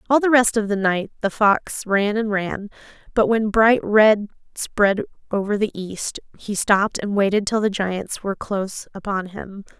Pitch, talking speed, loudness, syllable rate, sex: 205 Hz, 185 wpm, -20 LUFS, 4.4 syllables/s, female